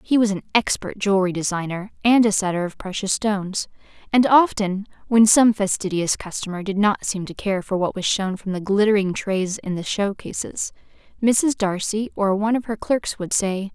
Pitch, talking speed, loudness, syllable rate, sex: 200 Hz, 190 wpm, -21 LUFS, 5.0 syllables/s, female